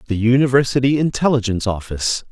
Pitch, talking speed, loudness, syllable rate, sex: 120 Hz, 105 wpm, -17 LUFS, 6.7 syllables/s, male